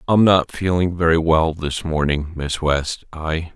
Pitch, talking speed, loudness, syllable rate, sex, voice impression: 80 Hz, 170 wpm, -19 LUFS, 3.9 syllables/s, male, very masculine, very adult-like, very middle-aged, very thick, very tensed, very powerful, slightly dark, slightly hard, slightly muffled, fluent, slightly raspy, very cool, very intellectual, very sincere, very calm, very mature, friendly, very reassuring, very unique, elegant, very wild, sweet, slightly lively, kind, slightly intense, slightly modest